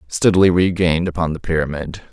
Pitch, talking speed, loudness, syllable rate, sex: 85 Hz, 170 wpm, -17 LUFS, 6.4 syllables/s, male